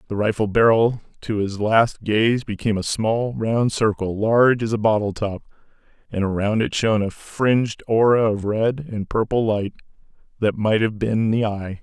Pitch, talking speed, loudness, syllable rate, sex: 110 Hz, 180 wpm, -20 LUFS, 4.7 syllables/s, male